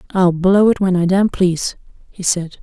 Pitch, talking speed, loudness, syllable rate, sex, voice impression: 185 Hz, 205 wpm, -16 LUFS, 4.8 syllables/s, female, feminine, slightly adult-like, soft, slightly cute, calm, sweet, kind